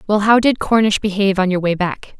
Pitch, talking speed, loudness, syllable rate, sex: 200 Hz, 245 wpm, -16 LUFS, 5.9 syllables/s, female